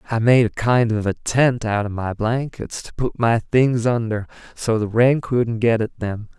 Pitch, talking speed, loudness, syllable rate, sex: 115 Hz, 215 wpm, -20 LUFS, 4.3 syllables/s, male